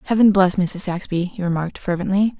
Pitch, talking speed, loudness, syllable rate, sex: 190 Hz, 175 wpm, -20 LUFS, 5.9 syllables/s, female